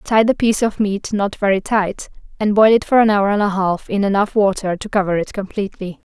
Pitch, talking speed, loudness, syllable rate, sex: 205 Hz, 235 wpm, -17 LUFS, 5.7 syllables/s, female